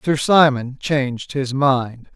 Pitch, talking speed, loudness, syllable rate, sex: 135 Hz, 140 wpm, -18 LUFS, 3.6 syllables/s, male